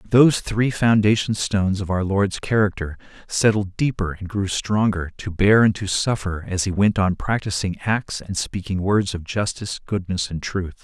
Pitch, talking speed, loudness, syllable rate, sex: 100 Hz, 185 wpm, -21 LUFS, 4.8 syllables/s, male